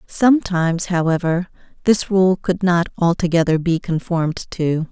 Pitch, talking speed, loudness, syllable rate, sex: 175 Hz, 120 wpm, -18 LUFS, 4.6 syllables/s, female